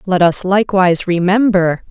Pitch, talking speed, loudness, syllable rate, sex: 185 Hz, 125 wpm, -13 LUFS, 5.1 syllables/s, female